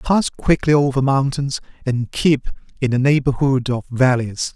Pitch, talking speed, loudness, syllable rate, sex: 135 Hz, 145 wpm, -18 LUFS, 4.4 syllables/s, male